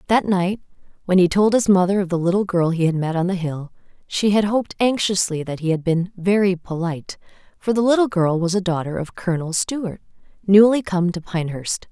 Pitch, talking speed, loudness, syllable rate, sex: 185 Hz, 205 wpm, -20 LUFS, 5.6 syllables/s, female